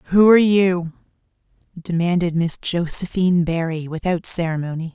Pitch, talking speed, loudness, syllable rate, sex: 175 Hz, 110 wpm, -19 LUFS, 4.9 syllables/s, female